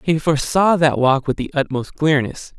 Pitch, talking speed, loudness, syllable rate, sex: 145 Hz, 185 wpm, -18 LUFS, 4.9 syllables/s, male